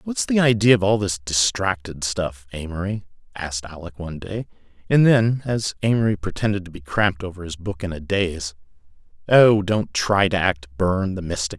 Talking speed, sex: 190 wpm, male